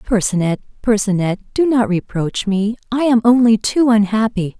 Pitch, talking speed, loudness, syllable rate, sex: 220 Hz, 145 wpm, -16 LUFS, 4.8 syllables/s, female